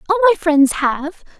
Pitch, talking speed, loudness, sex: 335 Hz, 170 wpm, -15 LUFS, female